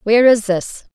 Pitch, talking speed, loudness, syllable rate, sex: 215 Hz, 190 wpm, -15 LUFS, 4.9 syllables/s, female